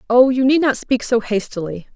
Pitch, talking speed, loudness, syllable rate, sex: 235 Hz, 215 wpm, -17 LUFS, 5.3 syllables/s, female